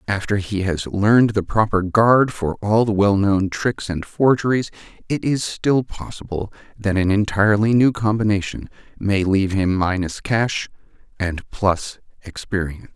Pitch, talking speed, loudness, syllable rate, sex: 100 Hz, 145 wpm, -19 LUFS, 4.5 syllables/s, male